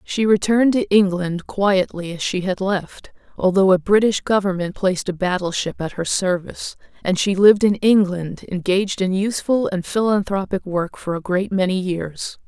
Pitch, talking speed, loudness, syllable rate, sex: 190 Hz, 165 wpm, -19 LUFS, 4.9 syllables/s, female